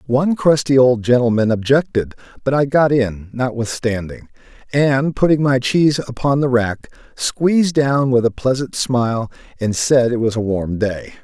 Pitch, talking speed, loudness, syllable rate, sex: 125 Hz, 160 wpm, -17 LUFS, 4.7 syllables/s, male